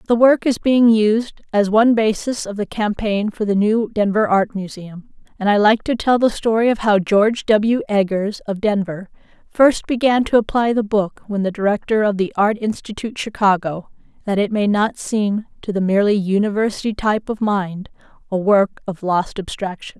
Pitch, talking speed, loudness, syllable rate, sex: 210 Hz, 185 wpm, -18 LUFS, 5.0 syllables/s, female